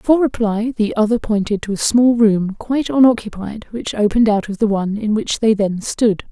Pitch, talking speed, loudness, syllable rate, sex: 220 Hz, 210 wpm, -17 LUFS, 5.2 syllables/s, female